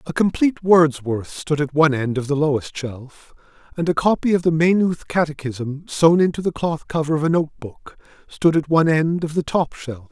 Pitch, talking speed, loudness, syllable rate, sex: 155 Hz, 200 wpm, -19 LUFS, 5.2 syllables/s, male